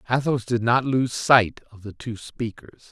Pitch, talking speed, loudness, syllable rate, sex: 120 Hz, 185 wpm, -22 LUFS, 4.3 syllables/s, male